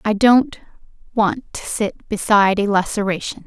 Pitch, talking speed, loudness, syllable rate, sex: 210 Hz, 140 wpm, -18 LUFS, 4.5 syllables/s, female